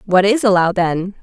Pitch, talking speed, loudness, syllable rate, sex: 195 Hz, 195 wpm, -15 LUFS, 5.8 syllables/s, female